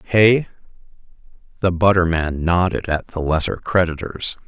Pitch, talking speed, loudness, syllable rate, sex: 90 Hz, 120 wpm, -19 LUFS, 4.4 syllables/s, male